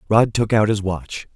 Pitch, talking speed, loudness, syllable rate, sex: 105 Hz, 220 wpm, -19 LUFS, 4.4 syllables/s, male